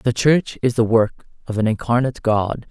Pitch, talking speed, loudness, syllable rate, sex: 120 Hz, 200 wpm, -19 LUFS, 4.9 syllables/s, male